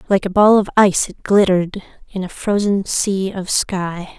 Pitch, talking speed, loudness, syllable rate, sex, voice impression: 195 Hz, 185 wpm, -17 LUFS, 4.7 syllables/s, female, very feminine, young, slightly thin, relaxed, weak, dark, very soft, slightly muffled, fluent, cute, intellectual, slightly refreshing, sincere, very calm, friendly, reassuring, unique, very elegant, slightly wild, sweet, slightly lively, very kind, slightly sharp, very modest